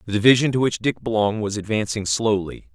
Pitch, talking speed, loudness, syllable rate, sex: 110 Hz, 195 wpm, -21 LUFS, 6.1 syllables/s, male